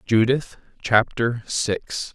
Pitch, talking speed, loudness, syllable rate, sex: 115 Hz, 85 wpm, -22 LUFS, 2.8 syllables/s, male